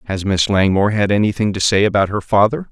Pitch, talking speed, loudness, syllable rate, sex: 105 Hz, 220 wpm, -16 LUFS, 6.3 syllables/s, male